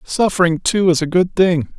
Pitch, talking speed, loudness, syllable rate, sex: 175 Hz, 200 wpm, -16 LUFS, 4.8 syllables/s, male